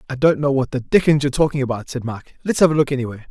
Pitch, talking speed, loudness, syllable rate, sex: 135 Hz, 290 wpm, -19 LUFS, 7.4 syllables/s, male